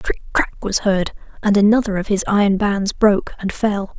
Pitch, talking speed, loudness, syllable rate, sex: 200 Hz, 195 wpm, -18 LUFS, 5.1 syllables/s, female